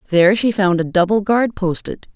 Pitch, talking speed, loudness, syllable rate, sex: 195 Hz, 195 wpm, -16 LUFS, 5.3 syllables/s, female